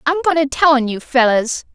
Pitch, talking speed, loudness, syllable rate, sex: 265 Hz, 240 wpm, -15 LUFS, 5.5 syllables/s, female